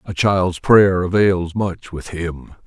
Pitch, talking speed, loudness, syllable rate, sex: 90 Hz, 155 wpm, -17 LUFS, 3.3 syllables/s, male